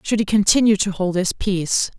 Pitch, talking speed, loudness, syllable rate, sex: 195 Hz, 210 wpm, -18 LUFS, 5.5 syllables/s, female